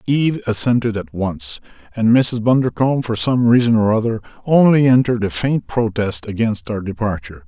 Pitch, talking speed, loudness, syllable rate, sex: 110 Hz, 160 wpm, -17 LUFS, 5.4 syllables/s, male